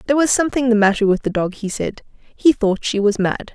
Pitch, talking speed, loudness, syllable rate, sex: 225 Hz, 255 wpm, -18 LUFS, 6.0 syllables/s, female